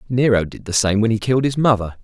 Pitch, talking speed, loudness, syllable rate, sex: 110 Hz, 265 wpm, -18 LUFS, 6.5 syllables/s, male